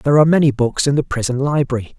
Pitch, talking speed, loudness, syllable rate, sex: 135 Hz, 240 wpm, -16 LUFS, 7.3 syllables/s, male